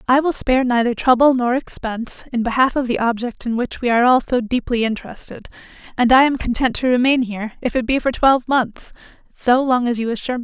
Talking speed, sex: 245 wpm, female